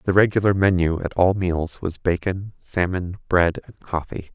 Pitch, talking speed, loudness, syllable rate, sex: 90 Hz, 165 wpm, -22 LUFS, 4.5 syllables/s, male